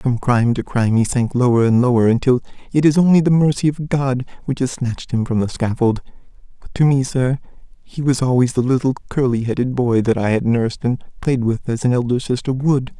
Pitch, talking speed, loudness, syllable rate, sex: 125 Hz, 220 wpm, -18 LUFS, 5.8 syllables/s, male